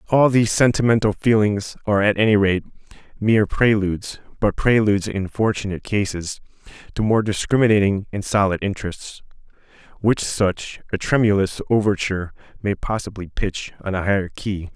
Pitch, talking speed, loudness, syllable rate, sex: 105 Hz, 135 wpm, -20 LUFS, 5.4 syllables/s, male